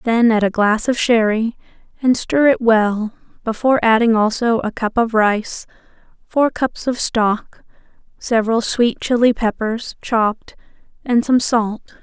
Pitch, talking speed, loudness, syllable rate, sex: 230 Hz, 145 wpm, -17 LUFS, 4.1 syllables/s, female